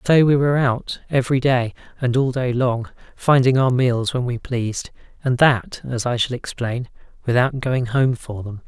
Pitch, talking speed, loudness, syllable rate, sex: 125 Hz, 185 wpm, -20 LUFS, 4.7 syllables/s, male